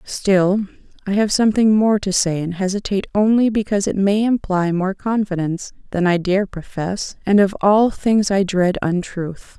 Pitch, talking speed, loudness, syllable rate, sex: 195 Hz, 170 wpm, -18 LUFS, 4.7 syllables/s, female